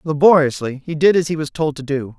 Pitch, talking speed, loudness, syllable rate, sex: 150 Hz, 245 wpm, -17 LUFS, 5.8 syllables/s, male